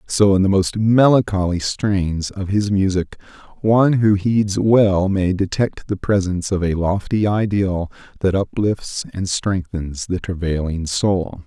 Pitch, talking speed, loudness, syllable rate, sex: 95 Hz, 145 wpm, -18 LUFS, 4.0 syllables/s, male